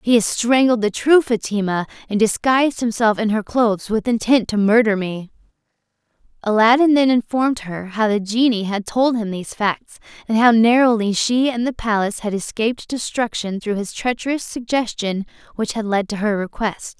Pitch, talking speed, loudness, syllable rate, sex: 225 Hz, 175 wpm, -18 LUFS, 5.2 syllables/s, female